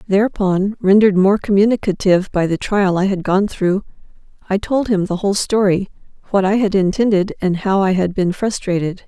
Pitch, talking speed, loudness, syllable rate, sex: 195 Hz, 180 wpm, -16 LUFS, 5.4 syllables/s, female